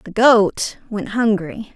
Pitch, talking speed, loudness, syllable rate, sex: 210 Hz, 135 wpm, -17 LUFS, 3.2 syllables/s, female